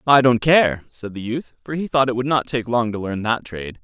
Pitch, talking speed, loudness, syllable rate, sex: 120 Hz, 280 wpm, -20 LUFS, 5.3 syllables/s, male